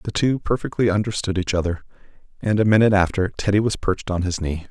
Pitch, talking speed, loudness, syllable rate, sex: 100 Hz, 205 wpm, -21 LUFS, 6.6 syllables/s, male